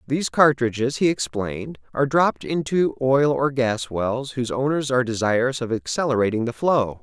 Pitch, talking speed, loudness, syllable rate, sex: 130 Hz, 160 wpm, -22 LUFS, 5.4 syllables/s, male